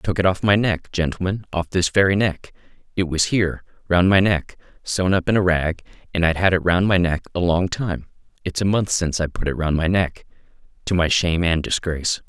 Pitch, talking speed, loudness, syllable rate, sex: 90 Hz, 230 wpm, -20 LUFS, 5.6 syllables/s, male